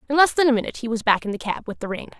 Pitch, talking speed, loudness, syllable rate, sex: 240 Hz, 385 wpm, -22 LUFS, 8.5 syllables/s, female